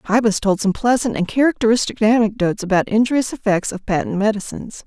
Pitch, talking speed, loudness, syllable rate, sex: 215 Hz, 160 wpm, -18 LUFS, 6.4 syllables/s, female